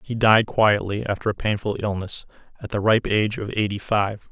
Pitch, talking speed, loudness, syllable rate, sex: 105 Hz, 195 wpm, -22 LUFS, 5.2 syllables/s, male